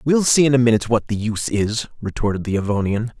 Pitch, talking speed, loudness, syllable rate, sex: 115 Hz, 225 wpm, -19 LUFS, 6.6 syllables/s, male